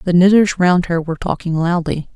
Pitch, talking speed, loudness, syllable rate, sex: 175 Hz, 195 wpm, -16 LUFS, 5.5 syllables/s, female